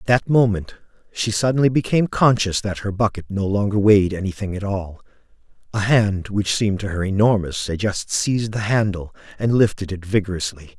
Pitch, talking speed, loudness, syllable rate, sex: 100 Hz, 180 wpm, -20 LUFS, 5.5 syllables/s, male